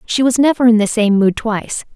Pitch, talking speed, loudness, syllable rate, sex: 230 Hz, 245 wpm, -14 LUFS, 5.7 syllables/s, female